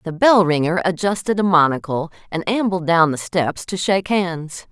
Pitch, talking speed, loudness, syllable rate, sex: 175 Hz, 180 wpm, -18 LUFS, 4.9 syllables/s, female